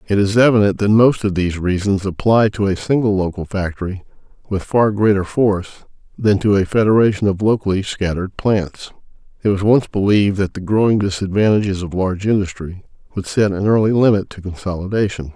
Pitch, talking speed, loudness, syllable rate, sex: 100 Hz, 170 wpm, -17 LUFS, 5.8 syllables/s, male